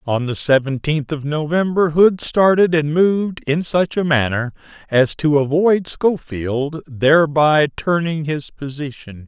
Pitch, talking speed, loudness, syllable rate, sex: 155 Hz, 135 wpm, -17 LUFS, 4.0 syllables/s, male